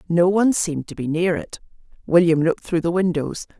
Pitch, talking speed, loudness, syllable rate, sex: 170 Hz, 200 wpm, -20 LUFS, 6.0 syllables/s, female